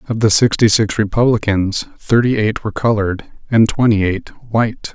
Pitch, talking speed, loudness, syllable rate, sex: 110 Hz, 160 wpm, -15 LUFS, 5.1 syllables/s, male